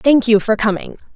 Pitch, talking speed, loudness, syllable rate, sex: 225 Hz, 210 wpm, -15 LUFS, 5.1 syllables/s, female